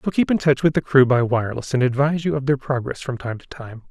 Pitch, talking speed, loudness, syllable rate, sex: 135 Hz, 305 wpm, -20 LUFS, 6.7 syllables/s, male